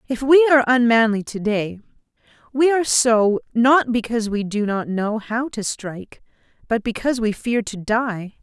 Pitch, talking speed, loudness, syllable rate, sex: 230 Hz, 165 wpm, -19 LUFS, 5.0 syllables/s, female